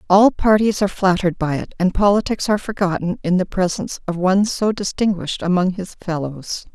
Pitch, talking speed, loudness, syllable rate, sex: 190 Hz, 180 wpm, -19 LUFS, 5.9 syllables/s, female